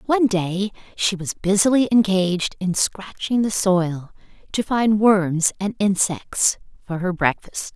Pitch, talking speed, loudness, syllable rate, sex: 195 Hz, 140 wpm, -20 LUFS, 4.0 syllables/s, female